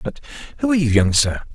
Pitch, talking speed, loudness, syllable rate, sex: 140 Hz, 235 wpm, -18 LUFS, 7.1 syllables/s, male